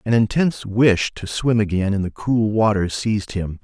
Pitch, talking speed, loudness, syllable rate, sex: 105 Hz, 200 wpm, -20 LUFS, 4.8 syllables/s, male